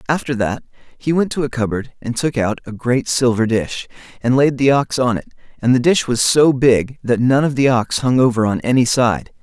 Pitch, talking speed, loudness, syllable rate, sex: 125 Hz, 230 wpm, -17 LUFS, 5.1 syllables/s, male